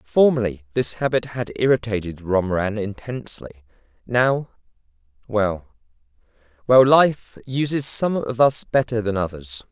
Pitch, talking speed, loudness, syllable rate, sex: 110 Hz, 110 wpm, -20 LUFS, 4.4 syllables/s, male